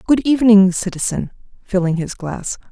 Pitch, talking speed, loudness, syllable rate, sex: 205 Hz, 135 wpm, -17 LUFS, 5.1 syllables/s, female